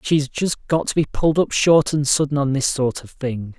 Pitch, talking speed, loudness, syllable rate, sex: 145 Hz, 250 wpm, -19 LUFS, 5.0 syllables/s, male